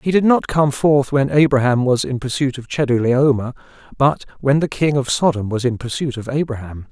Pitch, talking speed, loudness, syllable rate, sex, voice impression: 135 Hz, 200 wpm, -18 LUFS, 5.3 syllables/s, male, very masculine, adult-like, slightly middle-aged, slightly thick, tensed, powerful, slightly bright, slightly hard, clear, very fluent, slightly raspy, cool, intellectual, very refreshing, very sincere, slightly calm, friendly, reassuring, slightly unique, elegant, slightly sweet, lively, kind, slightly intense, slightly modest, slightly light